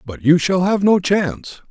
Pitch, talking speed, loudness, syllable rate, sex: 175 Hz, 210 wpm, -16 LUFS, 4.8 syllables/s, male